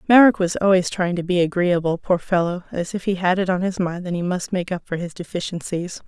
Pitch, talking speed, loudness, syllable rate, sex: 180 Hz, 245 wpm, -21 LUFS, 5.7 syllables/s, female